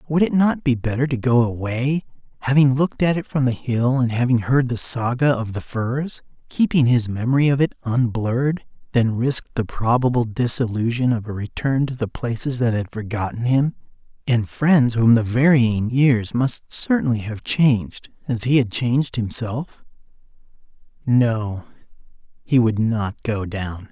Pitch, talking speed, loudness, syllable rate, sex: 125 Hz, 165 wpm, -20 LUFS, 4.6 syllables/s, male